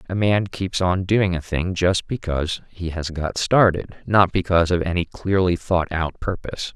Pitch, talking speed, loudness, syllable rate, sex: 90 Hz, 185 wpm, -21 LUFS, 4.8 syllables/s, male